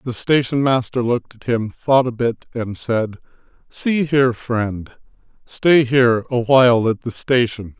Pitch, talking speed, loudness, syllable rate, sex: 120 Hz, 160 wpm, -18 LUFS, 4.3 syllables/s, male